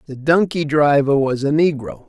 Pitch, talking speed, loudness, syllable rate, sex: 150 Hz, 175 wpm, -17 LUFS, 4.7 syllables/s, male